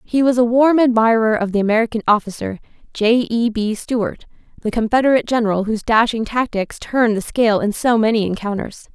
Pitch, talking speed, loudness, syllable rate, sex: 225 Hz, 175 wpm, -17 LUFS, 5.9 syllables/s, female